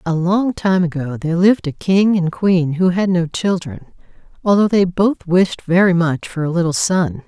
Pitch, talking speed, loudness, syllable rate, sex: 175 Hz, 200 wpm, -16 LUFS, 4.7 syllables/s, female